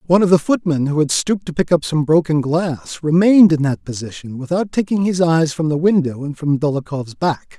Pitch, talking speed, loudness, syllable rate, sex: 160 Hz, 220 wpm, -17 LUFS, 5.5 syllables/s, male